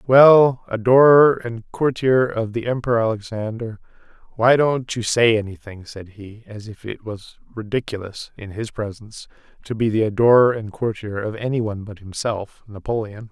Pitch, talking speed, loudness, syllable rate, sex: 115 Hz, 155 wpm, -19 LUFS, 4.8 syllables/s, male